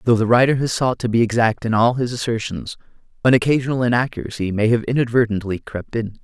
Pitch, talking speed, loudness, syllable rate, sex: 115 Hz, 190 wpm, -19 LUFS, 6.3 syllables/s, male